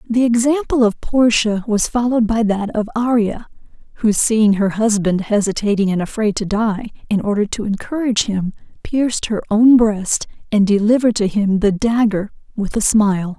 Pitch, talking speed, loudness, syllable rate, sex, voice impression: 215 Hz, 165 wpm, -17 LUFS, 5.0 syllables/s, female, very feminine, slightly young, adult-like, thin, slightly relaxed, slightly weak, slightly dark, very soft, slightly clear, fluent, slightly raspy, very cute, intellectual, very refreshing, sincere, very calm, friendly, very reassuring, unique, very elegant, very sweet, slightly lively, very kind, modest, slightly light